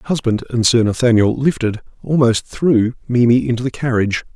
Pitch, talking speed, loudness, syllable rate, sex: 120 Hz, 140 wpm, -16 LUFS, 5.5 syllables/s, male